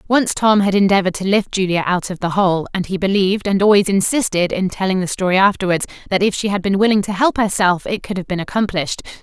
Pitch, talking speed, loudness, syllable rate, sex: 195 Hz, 235 wpm, -17 LUFS, 6.3 syllables/s, female